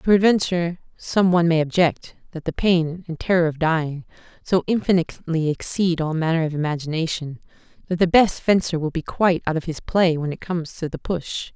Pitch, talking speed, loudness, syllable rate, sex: 170 Hz, 185 wpm, -21 LUFS, 5.6 syllables/s, female